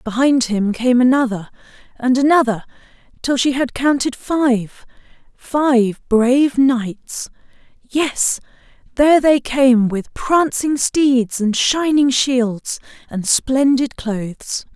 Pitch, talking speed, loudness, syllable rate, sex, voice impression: 255 Hz, 105 wpm, -16 LUFS, 3.3 syllables/s, female, gender-neutral, slightly young, tensed, slightly clear, refreshing, slightly friendly